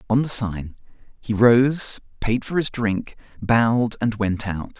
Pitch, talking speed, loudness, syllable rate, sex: 115 Hz, 165 wpm, -21 LUFS, 3.9 syllables/s, male